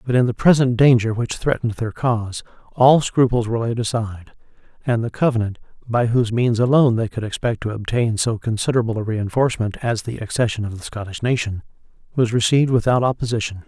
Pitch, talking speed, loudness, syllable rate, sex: 115 Hz, 180 wpm, -19 LUFS, 6.1 syllables/s, male